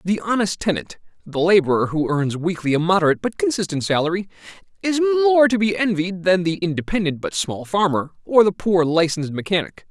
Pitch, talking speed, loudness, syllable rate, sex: 180 Hz, 165 wpm, -20 LUFS, 5.7 syllables/s, male